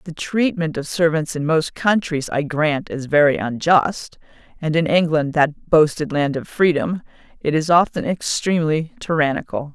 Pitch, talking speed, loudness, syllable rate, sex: 160 Hz, 155 wpm, -19 LUFS, 4.6 syllables/s, female